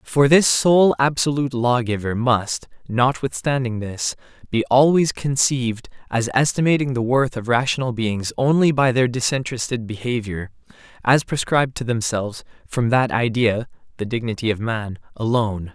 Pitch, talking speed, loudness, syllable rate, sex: 120 Hz, 135 wpm, -20 LUFS, 4.7 syllables/s, male